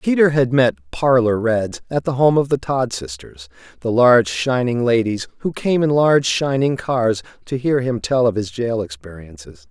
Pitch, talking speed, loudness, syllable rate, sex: 120 Hz, 185 wpm, -18 LUFS, 4.6 syllables/s, male